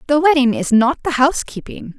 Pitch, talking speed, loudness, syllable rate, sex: 270 Hz, 180 wpm, -15 LUFS, 5.6 syllables/s, female